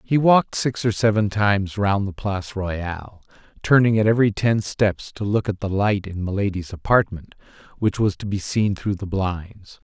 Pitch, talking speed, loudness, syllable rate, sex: 100 Hz, 190 wpm, -21 LUFS, 4.8 syllables/s, male